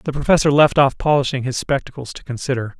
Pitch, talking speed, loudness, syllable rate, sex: 135 Hz, 195 wpm, -17 LUFS, 6.2 syllables/s, male